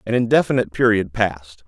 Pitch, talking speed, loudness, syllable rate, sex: 105 Hz, 145 wpm, -18 LUFS, 6.5 syllables/s, male